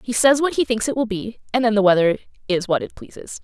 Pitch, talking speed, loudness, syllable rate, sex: 225 Hz, 280 wpm, -19 LUFS, 6.2 syllables/s, female